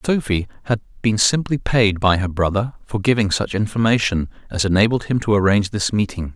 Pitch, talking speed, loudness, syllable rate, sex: 105 Hz, 180 wpm, -19 LUFS, 5.7 syllables/s, male